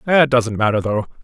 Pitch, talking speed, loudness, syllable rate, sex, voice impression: 120 Hz, 195 wpm, -17 LUFS, 5.3 syllables/s, male, masculine, adult-like, slightly thick, tensed, powerful, clear, fluent, cool, sincere, slightly mature, unique, wild, strict, sharp